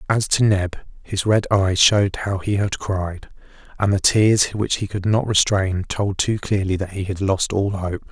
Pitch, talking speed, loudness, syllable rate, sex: 100 Hz, 205 wpm, -20 LUFS, 4.3 syllables/s, male